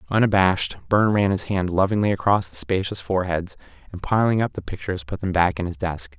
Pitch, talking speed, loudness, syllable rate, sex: 95 Hz, 205 wpm, -22 LUFS, 6.1 syllables/s, male